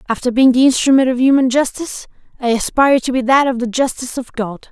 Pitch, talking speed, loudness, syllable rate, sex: 255 Hz, 215 wpm, -15 LUFS, 6.4 syllables/s, female